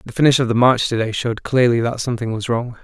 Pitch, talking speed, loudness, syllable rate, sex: 120 Hz, 275 wpm, -18 LUFS, 6.7 syllables/s, male